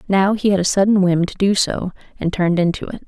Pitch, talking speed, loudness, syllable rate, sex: 185 Hz, 255 wpm, -17 LUFS, 6.1 syllables/s, female